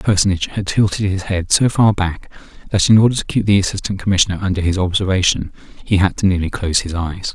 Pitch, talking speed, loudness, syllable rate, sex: 95 Hz, 220 wpm, -16 LUFS, 6.6 syllables/s, male